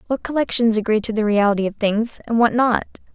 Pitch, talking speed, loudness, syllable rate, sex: 225 Hz, 210 wpm, -19 LUFS, 6.1 syllables/s, female